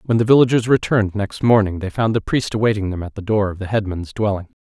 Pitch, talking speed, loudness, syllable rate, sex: 105 Hz, 245 wpm, -18 LUFS, 6.3 syllables/s, male